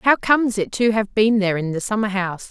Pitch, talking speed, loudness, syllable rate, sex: 210 Hz, 265 wpm, -19 LUFS, 6.1 syllables/s, female